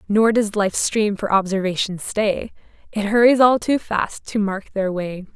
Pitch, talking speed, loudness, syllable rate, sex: 205 Hz, 180 wpm, -19 LUFS, 4.4 syllables/s, female